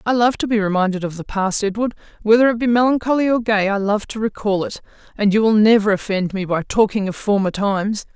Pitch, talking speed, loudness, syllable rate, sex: 210 Hz, 215 wpm, -18 LUFS, 6.0 syllables/s, female